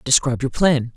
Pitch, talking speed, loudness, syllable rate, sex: 135 Hz, 190 wpm, -19 LUFS, 5.9 syllables/s, male